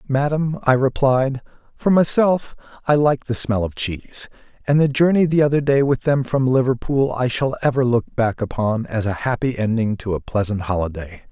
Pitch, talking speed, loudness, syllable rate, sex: 125 Hz, 185 wpm, -19 LUFS, 5.1 syllables/s, male